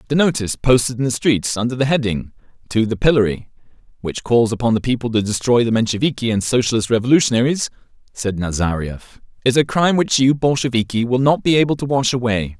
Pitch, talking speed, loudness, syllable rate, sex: 120 Hz, 185 wpm, -17 LUFS, 6.3 syllables/s, male